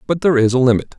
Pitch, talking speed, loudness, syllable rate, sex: 135 Hz, 305 wpm, -15 LUFS, 8.2 syllables/s, male